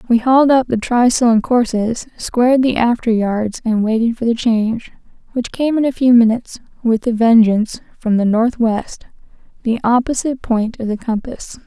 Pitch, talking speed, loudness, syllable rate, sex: 235 Hz, 175 wpm, -16 LUFS, 5.1 syllables/s, female